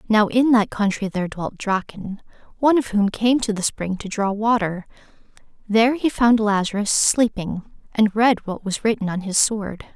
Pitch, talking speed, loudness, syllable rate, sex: 215 Hz, 180 wpm, -20 LUFS, 4.8 syllables/s, female